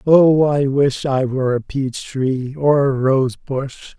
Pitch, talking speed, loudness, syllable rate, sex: 135 Hz, 180 wpm, -17 LUFS, 3.4 syllables/s, male